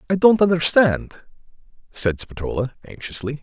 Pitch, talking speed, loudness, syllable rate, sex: 150 Hz, 105 wpm, -20 LUFS, 4.8 syllables/s, male